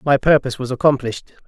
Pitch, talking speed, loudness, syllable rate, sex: 135 Hz, 160 wpm, -17 LUFS, 7.3 syllables/s, male